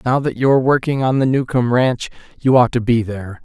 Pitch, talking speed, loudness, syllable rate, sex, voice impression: 125 Hz, 225 wpm, -16 LUFS, 5.6 syllables/s, male, masculine, adult-like, tensed, powerful, clear, raspy, mature, wild, lively, strict, slightly sharp